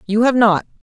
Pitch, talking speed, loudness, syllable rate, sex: 220 Hz, 200 wpm, -15 LUFS, 5.5 syllables/s, female